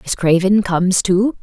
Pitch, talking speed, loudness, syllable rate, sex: 190 Hz, 170 wpm, -15 LUFS, 4.5 syllables/s, female